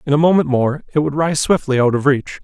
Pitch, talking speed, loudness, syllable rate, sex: 145 Hz, 270 wpm, -16 LUFS, 5.8 syllables/s, male